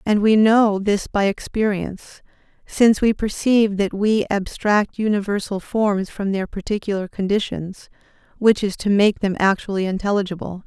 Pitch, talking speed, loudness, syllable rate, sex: 205 Hz, 140 wpm, -20 LUFS, 4.9 syllables/s, female